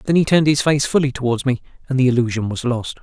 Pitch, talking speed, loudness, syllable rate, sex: 130 Hz, 260 wpm, -18 LUFS, 7.0 syllables/s, male